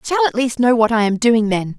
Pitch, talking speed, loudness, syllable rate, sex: 225 Hz, 335 wpm, -16 LUFS, 5.9 syllables/s, female